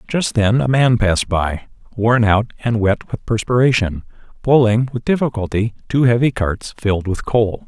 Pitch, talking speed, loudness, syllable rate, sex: 115 Hz, 165 wpm, -17 LUFS, 4.8 syllables/s, male